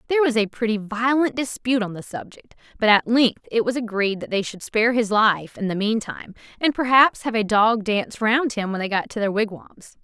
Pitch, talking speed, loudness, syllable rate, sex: 225 Hz, 235 wpm, -21 LUFS, 5.6 syllables/s, female